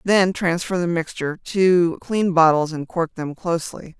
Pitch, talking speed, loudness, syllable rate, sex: 170 Hz, 165 wpm, -20 LUFS, 4.5 syllables/s, female